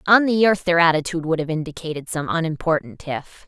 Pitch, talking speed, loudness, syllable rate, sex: 165 Hz, 190 wpm, -20 LUFS, 6.1 syllables/s, female